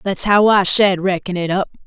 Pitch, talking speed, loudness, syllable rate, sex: 195 Hz, 225 wpm, -15 LUFS, 4.9 syllables/s, female